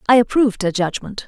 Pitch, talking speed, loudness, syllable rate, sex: 215 Hz, 190 wpm, -18 LUFS, 6.4 syllables/s, female